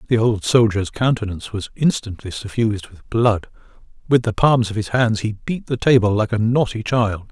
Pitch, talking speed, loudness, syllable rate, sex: 110 Hz, 190 wpm, -19 LUFS, 5.1 syllables/s, male